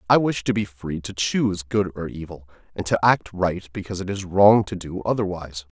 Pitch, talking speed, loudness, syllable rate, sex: 95 Hz, 220 wpm, -22 LUFS, 5.5 syllables/s, male